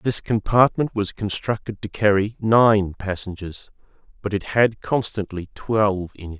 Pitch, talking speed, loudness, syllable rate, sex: 105 Hz, 140 wpm, -21 LUFS, 4.3 syllables/s, male